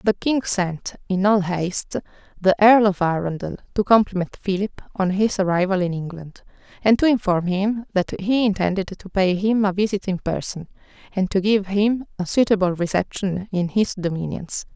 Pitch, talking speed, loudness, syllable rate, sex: 195 Hz, 170 wpm, -21 LUFS, 4.9 syllables/s, female